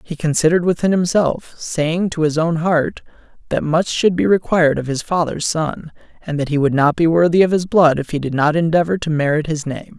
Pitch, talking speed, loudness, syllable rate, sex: 160 Hz, 220 wpm, -17 LUFS, 5.4 syllables/s, male